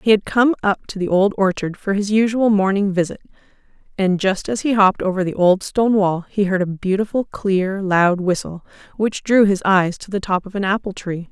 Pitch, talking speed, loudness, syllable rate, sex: 195 Hz, 215 wpm, -18 LUFS, 5.2 syllables/s, female